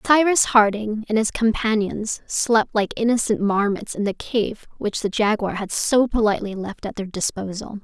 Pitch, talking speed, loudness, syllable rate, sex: 215 Hz, 170 wpm, -21 LUFS, 4.7 syllables/s, female